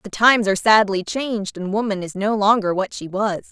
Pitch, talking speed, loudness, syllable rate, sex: 205 Hz, 220 wpm, -19 LUFS, 5.6 syllables/s, female